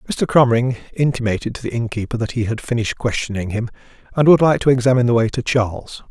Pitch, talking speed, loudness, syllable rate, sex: 120 Hz, 195 wpm, -18 LUFS, 6.9 syllables/s, male